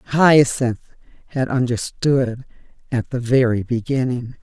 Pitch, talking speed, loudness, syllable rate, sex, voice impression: 125 Hz, 95 wpm, -19 LUFS, 3.9 syllables/s, female, feminine, gender-neutral, very middle-aged, slightly thin, very tensed, very powerful, bright, slightly hard, slightly soft, very clear, very fluent, slightly cool, intellectual, slightly refreshing, slightly sincere, calm, friendly, reassuring, very unique, slightly elegant, wild, slightly sweet, lively, strict, slightly intense, sharp, slightly light